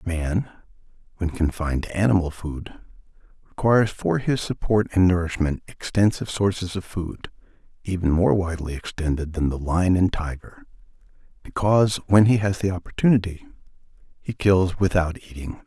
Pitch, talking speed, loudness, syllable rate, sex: 90 Hz, 135 wpm, -22 LUFS, 5.2 syllables/s, male